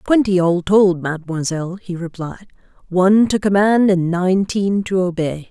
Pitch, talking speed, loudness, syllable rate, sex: 185 Hz, 140 wpm, -17 LUFS, 4.8 syllables/s, female